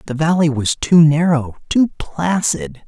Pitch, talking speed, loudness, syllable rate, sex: 150 Hz, 145 wpm, -16 LUFS, 4.0 syllables/s, male